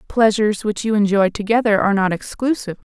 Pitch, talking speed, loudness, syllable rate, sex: 210 Hz, 185 wpm, -18 LUFS, 6.9 syllables/s, female